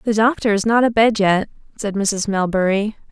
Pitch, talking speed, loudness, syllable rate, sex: 210 Hz, 175 wpm, -18 LUFS, 5.0 syllables/s, female